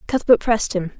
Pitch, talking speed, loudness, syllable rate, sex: 220 Hz, 180 wpm, -18 LUFS, 6.1 syllables/s, female